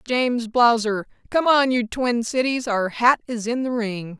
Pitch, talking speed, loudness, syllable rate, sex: 235 Hz, 160 wpm, -21 LUFS, 4.2 syllables/s, female